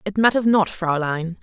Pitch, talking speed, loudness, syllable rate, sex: 190 Hz, 170 wpm, -19 LUFS, 4.6 syllables/s, female